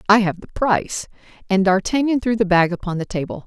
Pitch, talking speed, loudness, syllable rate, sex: 200 Hz, 210 wpm, -19 LUFS, 6.0 syllables/s, female